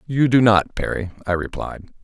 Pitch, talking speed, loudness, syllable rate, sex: 110 Hz, 175 wpm, -19 LUFS, 4.8 syllables/s, male